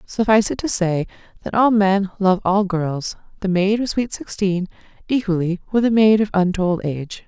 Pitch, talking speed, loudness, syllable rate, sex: 195 Hz, 180 wpm, -19 LUFS, 4.9 syllables/s, female